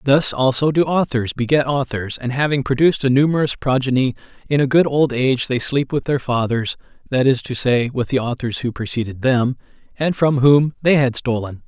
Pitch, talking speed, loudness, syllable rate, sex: 130 Hz, 190 wpm, -18 LUFS, 5.3 syllables/s, male